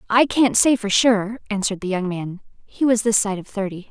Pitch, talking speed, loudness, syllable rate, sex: 210 Hz, 215 wpm, -19 LUFS, 5.3 syllables/s, female